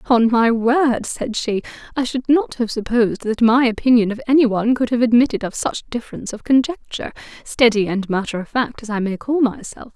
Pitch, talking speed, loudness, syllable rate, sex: 235 Hz, 205 wpm, -18 LUFS, 5.7 syllables/s, female